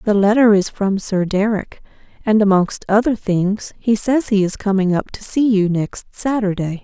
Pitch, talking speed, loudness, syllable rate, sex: 205 Hz, 185 wpm, -17 LUFS, 4.5 syllables/s, female